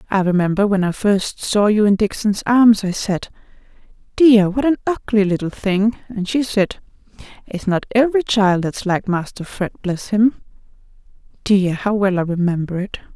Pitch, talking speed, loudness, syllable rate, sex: 205 Hz, 170 wpm, -17 LUFS, 4.7 syllables/s, female